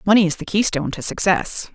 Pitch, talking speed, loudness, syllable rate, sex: 180 Hz, 205 wpm, -19 LUFS, 6.3 syllables/s, female